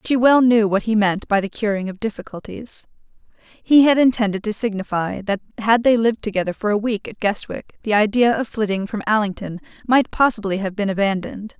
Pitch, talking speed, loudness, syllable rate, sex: 215 Hz, 190 wpm, -19 LUFS, 5.7 syllables/s, female